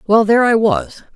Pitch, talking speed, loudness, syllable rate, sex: 210 Hz, 210 wpm, -14 LUFS, 5.5 syllables/s, male